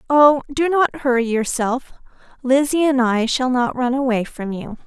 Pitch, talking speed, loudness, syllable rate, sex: 260 Hz, 175 wpm, -18 LUFS, 4.5 syllables/s, female